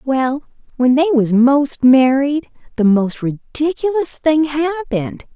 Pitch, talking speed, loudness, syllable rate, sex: 275 Hz, 125 wpm, -15 LUFS, 3.8 syllables/s, female